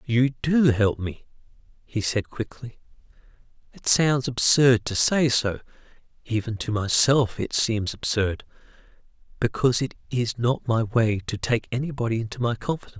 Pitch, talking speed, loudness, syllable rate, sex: 115 Hz, 145 wpm, -23 LUFS, 4.7 syllables/s, male